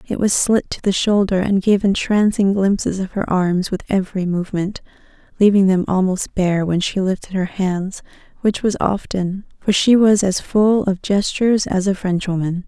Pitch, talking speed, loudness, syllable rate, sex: 195 Hz, 180 wpm, -18 LUFS, 4.8 syllables/s, female